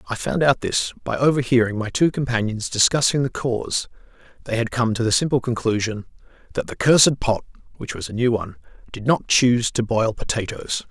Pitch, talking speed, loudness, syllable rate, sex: 120 Hz, 185 wpm, -21 LUFS, 5.4 syllables/s, male